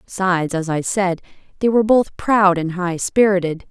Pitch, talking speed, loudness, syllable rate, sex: 185 Hz, 180 wpm, -18 LUFS, 5.3 syllables/s, female